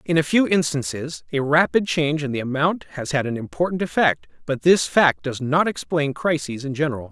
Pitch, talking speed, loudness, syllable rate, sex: 150 Hz, 200 wpm, -21 LUFS, 5.3 syllables/s, male